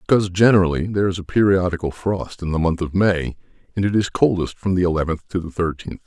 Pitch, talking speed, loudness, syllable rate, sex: 90 Hz, 220 wpm, -20 LUFS, 6.4 syllables/s, male